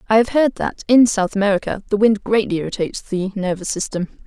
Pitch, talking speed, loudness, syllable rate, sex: 205 Hz, 195 wpm, -18 LUFS, 5.9 syllables/s, female